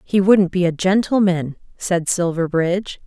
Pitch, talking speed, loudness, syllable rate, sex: 180 Hz, 135 wpm, -18 LUFS, 4.4 syllables/s, female